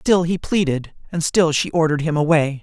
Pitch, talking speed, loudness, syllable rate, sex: 160 Hz, 205 wpm, -19 LUFS, 5.4 syllables/s, male